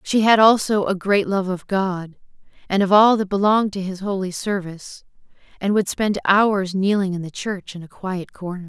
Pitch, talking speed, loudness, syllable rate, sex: 195 Hz, 200 wpm, -20 LUFS, 5.0 syllables/s, female